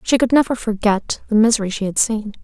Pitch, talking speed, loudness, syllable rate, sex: 220 Hz, 220 wpm, -17 LUFS, 5.9 syllables/s, female